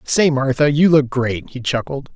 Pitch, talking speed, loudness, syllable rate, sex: 135 Hz, 195 wpm, -17 LUFS, 4.4 syllables/s, male